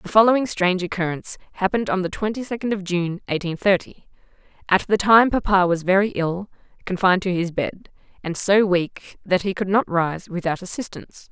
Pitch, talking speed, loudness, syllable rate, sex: 190 Hz, 175 wpm, -21 LUFS, 5.5 syllables/s, female